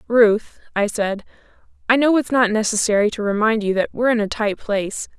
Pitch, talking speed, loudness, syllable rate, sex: 220 Hz, 195 wpm, -19 LUFS, 5.5 syllables/s, female